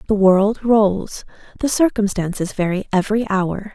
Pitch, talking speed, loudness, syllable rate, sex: 205 Hz, 130 wpm, -18 LUFS, 4.5 syllables/s, female